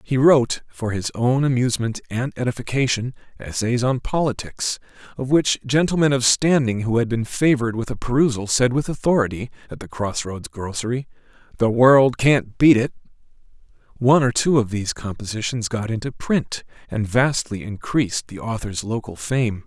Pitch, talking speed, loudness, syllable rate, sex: 120 Hz, 160 wpm, -20 LUFS, 5.2 syllables/s, male